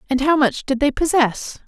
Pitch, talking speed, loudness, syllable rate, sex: 275 Hz, 215 wpm, -18 LUFS, 4.9 syllables/s, female